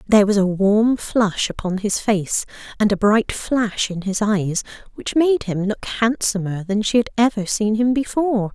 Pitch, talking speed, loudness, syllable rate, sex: 210 Hz, 190 wpm, -19 LUFS, 4.5 syllables/s, female